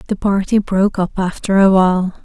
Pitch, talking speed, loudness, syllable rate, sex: 190 Hz, 190 wpm, -15 LUFS, 5.7 syllables/s, female